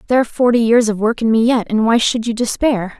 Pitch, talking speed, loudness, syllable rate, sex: 230 Hz, 280 wpm, -15 LUFS, 6.5 syllables/s, female